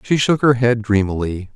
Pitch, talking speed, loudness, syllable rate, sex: 115 Hz, 195 wpm, -17 LUFS, 4.9 syllables/s, male